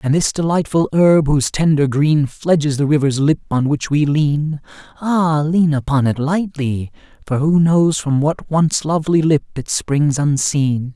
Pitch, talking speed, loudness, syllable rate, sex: 150 Hz, 170 wpm, -16 LUFS, 4.3 syllables/s, male